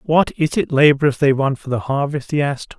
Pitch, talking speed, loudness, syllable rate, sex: 145 Hz, 235 wpm, -17 LUFS, 5.6 syllables/s, male